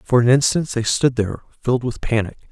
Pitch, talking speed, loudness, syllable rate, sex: 120 Hz, 215 wpm, -19 LUFS, 6.1 syllables/s, male